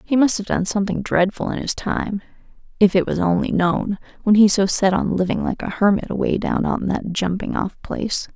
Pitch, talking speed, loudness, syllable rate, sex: 200 Hz, 215 wpm, -20 LUFS, 5.3 syllables/s, female